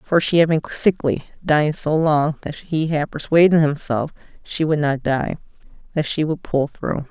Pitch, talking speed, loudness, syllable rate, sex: 155 Hz, 185 wpm, -19 LUFS, 4.7 syllables/s, female